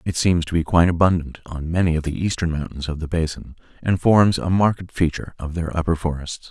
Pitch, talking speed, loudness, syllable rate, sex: 85 Hz, 220 wpm, -21 LUFS, 5.9 syllables/s, male